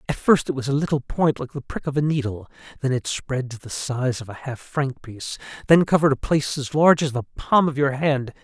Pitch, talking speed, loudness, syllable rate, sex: 135 Hz, 240 wpm, -22 LUFS, 5.7 syllables/s, male